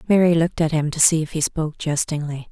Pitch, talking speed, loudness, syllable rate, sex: 160 Hz, 240 wpm, -20 LUFS, 6.4 syllables/s, female